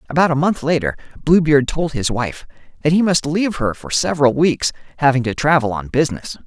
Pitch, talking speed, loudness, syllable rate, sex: 140 Hz, 195 wpm, -17 LUFS, 5.9 syllables/s, male